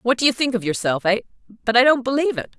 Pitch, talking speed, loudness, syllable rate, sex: 235 Hz, 255 wpm, -19 LUFS, 7.0 syllables/s, female